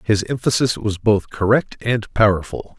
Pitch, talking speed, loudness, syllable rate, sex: 105 Hz, 150 wpm, -19 LUFS, 4.5 syllables/s, male